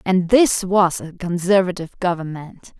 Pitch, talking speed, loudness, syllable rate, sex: 180 Hz, 130 wpm, -18 LUFS, 4.7 syllables/s, female